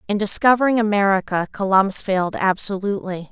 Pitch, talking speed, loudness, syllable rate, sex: 200 Hz, 110 wpm, -19 LUFS, 6.2 syllables/s, female